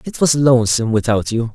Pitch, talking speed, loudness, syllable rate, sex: 120 Hz, 195 wpm, -15 LUFS, 6.2 syllables/s, male